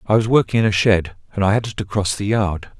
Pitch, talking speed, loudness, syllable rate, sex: 100 Hz, 280 wpm, -18 LUFS, 5.7 syllables/s, male